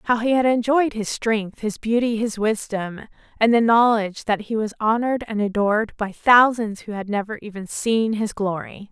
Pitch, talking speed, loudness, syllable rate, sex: 220 Hz, 190 wpm, -21 LUFS, 4.9 syllables/s, female